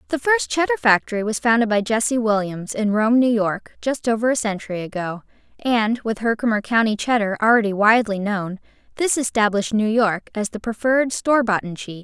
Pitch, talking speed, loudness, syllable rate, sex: 220 Hz, 180 wpm, -20 LUFS, 5.6 syllables/s, female